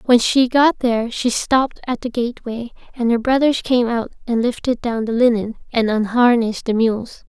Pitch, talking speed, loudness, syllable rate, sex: 235 Hz, 190 wpm, -18 LUFS, 5.1 syllables/s, female